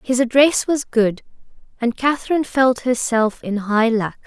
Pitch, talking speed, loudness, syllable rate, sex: 245 Hz, 155 wpm, -18 LUFS, 4.5 syllables/s, female